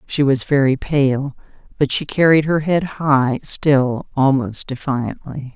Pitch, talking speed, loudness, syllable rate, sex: 140 Hz, 130 wpm, -17 LUFS, 3.7 syllables/s, female